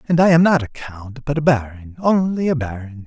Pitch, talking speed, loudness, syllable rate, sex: 140 Hz, 235 wpm, -17 LUFS, 5.2 syllables/s, male